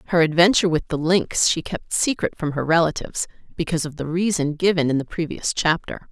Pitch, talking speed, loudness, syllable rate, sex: 165 Hz, 195 wpm, -21 LUFS, 6.0 syllables/s, female